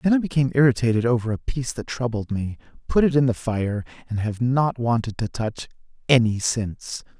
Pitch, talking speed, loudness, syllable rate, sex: 120 Hz, 190 wpm, -23 LUFS, 5.8 syllables/s, male